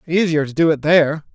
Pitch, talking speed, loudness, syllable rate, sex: 155 Hz, 225 wpm, -16 LUFS, 6.3 syllables/s, male